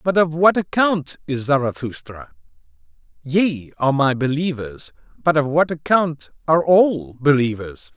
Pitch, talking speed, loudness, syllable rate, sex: 145 Hz, 130 wpm, -19 LUFS, 4.4 syllables/s, male